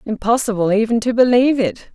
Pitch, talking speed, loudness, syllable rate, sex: 230 Hz, 155 wpm, -16 LUFS, 6.0 syllables/s, female